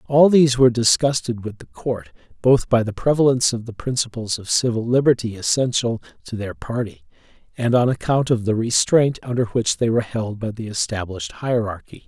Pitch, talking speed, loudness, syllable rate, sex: 120 Hz, 180 wpm, -20 LUFS, 5.5 syllables/s, male